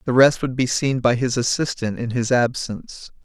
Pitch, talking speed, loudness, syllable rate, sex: 125 Hz, 205 wpm, -20 LUFS, 5.0 syllables/s, male